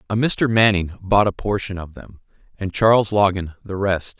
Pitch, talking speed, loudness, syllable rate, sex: 100 Hz, 185 wpm, -19 LUFS, 4.8 syllables/s, male